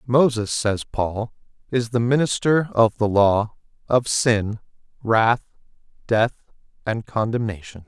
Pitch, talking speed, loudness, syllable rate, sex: 115 Hz, 115 wpm, -21 LUFS, 3.8 syllables/s, male